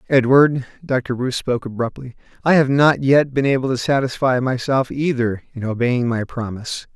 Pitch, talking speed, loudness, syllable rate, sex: 130 Hz, 165 wpm, -19 LUFS, 5.2 syllables/s, male